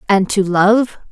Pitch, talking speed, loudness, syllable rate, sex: 200 Hz, 160 wpm, -14 LUFS, 3.5 syllables/s, female